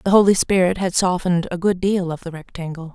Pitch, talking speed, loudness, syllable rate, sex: 180 Hz, 225 wpm, -19 LUFS, 6.1 syllables/s, female